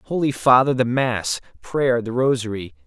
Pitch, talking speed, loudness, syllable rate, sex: 120 Hz, 125 wpm, -20 LUFS, 4.5 syllables/s, male